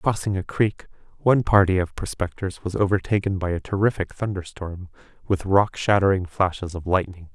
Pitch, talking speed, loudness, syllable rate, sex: 95 Hz, 155 wpm, -23 LUFS, 5.3 syllables/s, male